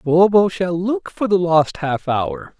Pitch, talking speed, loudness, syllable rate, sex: 175 Hz, 185 wpm, -18 LUFS, 3.6 syllables/s, male